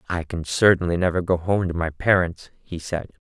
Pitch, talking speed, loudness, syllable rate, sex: 85 Hz, 200 wpm, -22 LUFS, 5.1 syllables/s, male